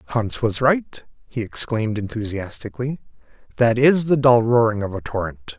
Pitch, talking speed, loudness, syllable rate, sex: 115 Hz, 150 wpm, -20 LUFS, 5.1 syllables/s, male